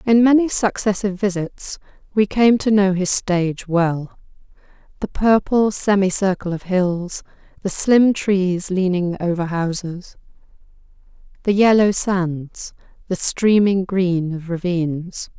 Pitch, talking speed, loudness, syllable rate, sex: 190 Hz, 115 wpm, -18 LUFS, 3.9 syllables/s, female